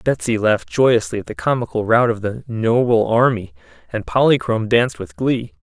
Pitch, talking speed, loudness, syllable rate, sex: 110 Hz, 170 wpm, -18 LUFS, 5.3 syllables/s, male